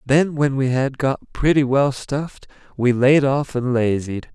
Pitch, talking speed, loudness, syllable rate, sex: 135 Hz, 180 wpm, -19 LUFS, 4.1 syllables/s, male